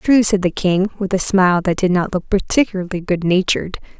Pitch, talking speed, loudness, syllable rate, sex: 190 Hz, 195 wpm, -17 LUFS, 5.7 syllables/s, female